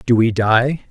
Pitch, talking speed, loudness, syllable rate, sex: 120 Hz, 200 wpm, -16 LUFS, 3.7 syllables/s, male